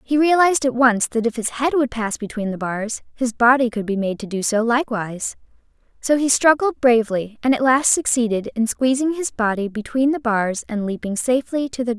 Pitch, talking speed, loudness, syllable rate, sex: 240 Hz, 215 wpm, -19 LUFS, 5.5 syllables/s, female